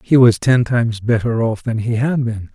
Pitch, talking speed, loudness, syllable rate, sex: 115 Hz, 235 wpm, -16 LUFS, 5.0 syllables/s, male